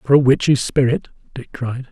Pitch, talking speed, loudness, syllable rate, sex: 130 Hz, 190 wpm, -17 LUFS, 4.8 syllables/s, male